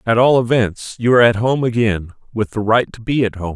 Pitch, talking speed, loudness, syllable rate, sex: 115 Hz, 255 wpm, -16 LUFS, 5.6 syllables/s, male